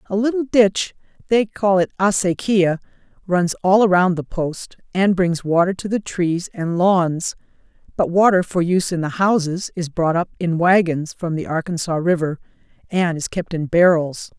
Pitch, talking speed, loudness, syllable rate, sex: 180 Hz, 165 wpm, -19 LUFS, 4.6 syllables/s, female